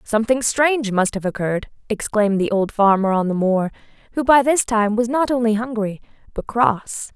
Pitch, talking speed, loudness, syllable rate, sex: 220 Hz, 185 wpm, -19 LUFS, 5.3 syllables/s, female